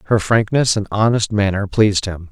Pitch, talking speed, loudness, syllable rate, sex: 105 Hz, 180 wpm, -17 LUFS, 5.3 syllables/s, male